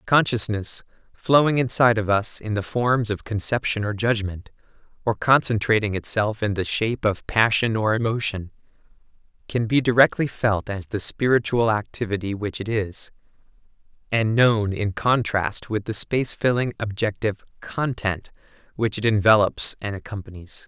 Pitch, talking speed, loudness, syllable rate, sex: 110 Hz, 140 wpm, -22 LUFS, 4.9 syllables/s, male